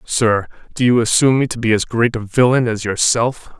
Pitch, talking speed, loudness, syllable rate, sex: 115 Hz, 215 wpm, -16 LUFS, 5.3 syllables/s, male